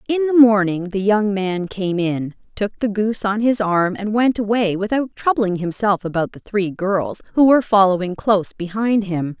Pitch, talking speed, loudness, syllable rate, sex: 205 Hz, 190 wpm, -18 LUFS, 4.7 syllables/s, female